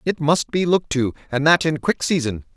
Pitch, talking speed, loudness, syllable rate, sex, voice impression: 145 Hz, 235 wpm, -20 LUFS, 5.5 syllables/s, male, masculine, adult-like, clear, refreshing, slightly sincere, elegant, slightly sweet